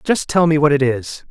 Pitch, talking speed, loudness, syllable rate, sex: 150 Hz, 275 wpm, -16 LUFS, 5.2 syllables/s, male